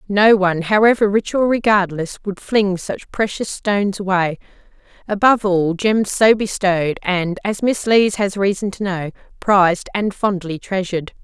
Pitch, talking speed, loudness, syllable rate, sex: 195 Hz, 155 wpm, -17 LUFS, 4.7 syllables/s, female